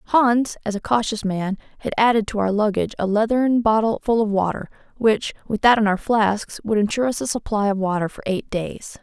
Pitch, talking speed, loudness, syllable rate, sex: 215 Hz, 215 wpm, -21 LUFS, 5.5 syllables/s, female